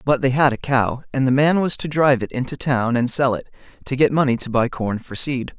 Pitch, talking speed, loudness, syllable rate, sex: 130 Hz, 270 wpm, -19 LUFS, 5.6 syllables/s, male